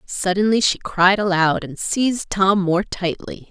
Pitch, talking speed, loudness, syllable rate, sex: 190 Hz, 155 wpm, -18 LUFS, 4.1 syllables/s, female